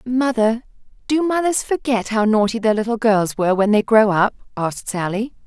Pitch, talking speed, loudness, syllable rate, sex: 225 Hz, 175 wpm, -18 LUFS, 5.2 syllables/s, female